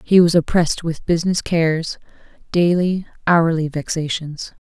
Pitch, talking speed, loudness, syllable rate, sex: 165 Hz, 115 wpm, -18 LUFS, 4.8 syllables/s, female